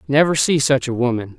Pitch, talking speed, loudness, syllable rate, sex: 135 Hz, 260 wpm, -17 LUFS, 6.1 syllables/s, male